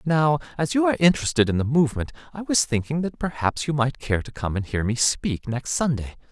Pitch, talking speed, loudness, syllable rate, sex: 135 Hz, 230 wpm, -23 LUFS, 5.9 syllables/s, male